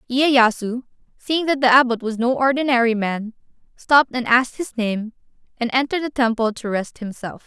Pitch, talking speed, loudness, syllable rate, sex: 245 Hz, 170 wpm, -19 LUFS, 5.2 syllables/s, female